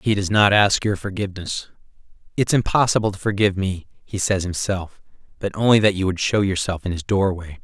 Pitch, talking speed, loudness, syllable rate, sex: 95 Hz, 175 wpm, -20 LUFS, 5.8 syllables/s, male